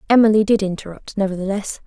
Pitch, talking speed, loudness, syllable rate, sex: 200 Hz, 130 wpm, -18 LUFS, 6.6 syllables/s, female